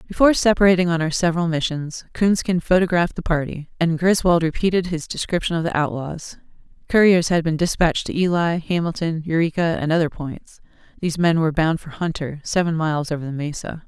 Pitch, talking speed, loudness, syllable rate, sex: 165 Hz, 175 wpm, -20 LUFS, 6.0 syllables/s, female